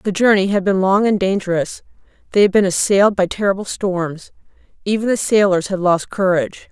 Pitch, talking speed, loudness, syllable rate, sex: 195 Hz, 180 wpm, -16 LUFS, 5.5 syllables/s, female